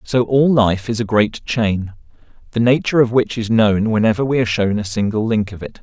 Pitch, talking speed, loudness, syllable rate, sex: 110 Hz, 225 wpm, -17 LUFS, 5.5 syllables/s, male